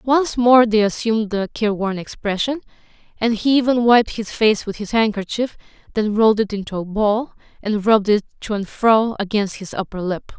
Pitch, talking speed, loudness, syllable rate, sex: 215 Hz, 185 wpm, -19 LUFS, 5.2 syllables/s, female